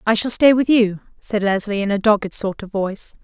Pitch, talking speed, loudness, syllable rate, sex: 210 Hz, 240 wpm, -18 LUFS, 5.5 syllables/s, female